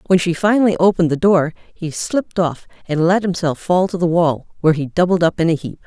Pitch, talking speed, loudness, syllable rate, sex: 175 Hz, 235 wpm, -17 LUFS, 5.8 syllables/s, female